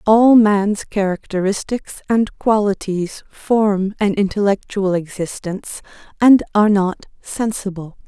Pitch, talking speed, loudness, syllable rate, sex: 200 Hz, 95 wpm, -17 LUFS, 4.0 syllables/s, female